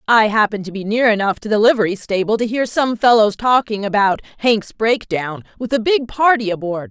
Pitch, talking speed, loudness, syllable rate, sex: 220 Hz, 200 wpm, -16 LUFS, 5.4 syllables/s, female